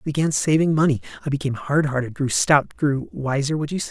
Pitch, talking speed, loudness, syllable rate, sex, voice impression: 145 Hz, 215 wpm, -21 LUFS, 6.3 syllables/s, male, masculine, adult-like, relaxed, hard, fluent, raspy, cool, sincere, friendly, wild, lively, kind